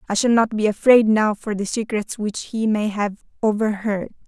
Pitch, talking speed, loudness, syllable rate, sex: 215 Hz, 195 wpm, -20 LUFS, 4.8 syllables/s, female